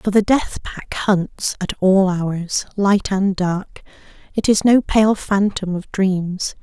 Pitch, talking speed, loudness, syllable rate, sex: 195 Hz, 165 wpm, -18 LUFS, 3.3 syllables/s, female